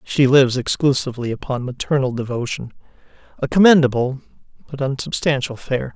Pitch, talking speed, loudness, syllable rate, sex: 135 Hz, 110 wpm, -19 LUFS, 5.7 syllables/s, male